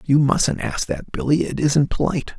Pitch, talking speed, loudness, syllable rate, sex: 140 Hz, 200 wpm, -20 LUFS, 4.9 syllables/s, male